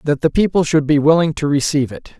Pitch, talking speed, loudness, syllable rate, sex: 150 Hz, 245 wpm, -16 LUFS, 6.6 syllables/s, male